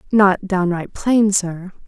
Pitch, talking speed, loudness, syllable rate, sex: 190 Hz, 130 wpm, -17 LUFS, 3.3 syllables/s, female